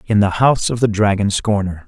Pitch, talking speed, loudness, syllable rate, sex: 105 Hz, 225 wpm, -16 LUFS, 5.8 syllables/s, male